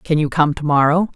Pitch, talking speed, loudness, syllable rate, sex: 155 Hz, 260 wpm, -16 LUFS, 5.9 syllables/s, female